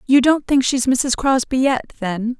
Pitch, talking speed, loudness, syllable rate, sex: 255 Hz, 200 wpm, -18 LUFS, 4.2 syllables/s, female